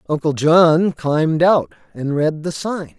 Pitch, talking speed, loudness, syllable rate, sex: 160 Hz, 160 wpm, -17 LUFS, 3.9 syllables/s, male